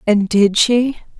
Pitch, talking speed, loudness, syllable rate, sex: 220 Hz, 150 wpm, -15 LUFS, 3.5 syllables/s, female